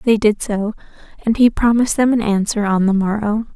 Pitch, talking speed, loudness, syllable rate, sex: 215 Hz, 205 wpm, -17 LUFS, 5.6 syllables/s, female